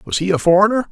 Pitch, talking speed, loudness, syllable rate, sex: 200 Hz, 260 wpm, -15 LUFS, 7.7 syllables/s, male